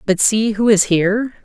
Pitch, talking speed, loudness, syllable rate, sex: 210 Hz, 210 wpm, -15 LUFS, 4.8 syllables/s, female